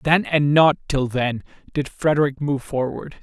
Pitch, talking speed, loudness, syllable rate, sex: 140 Hz, 165 wpm, -20 LUFS, 4.5 syllables/s, male